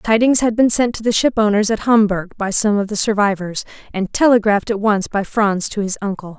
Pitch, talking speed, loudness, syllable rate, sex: 210 Hz, 215 wpm, -16 LUFS, 5.4 syllables/s, female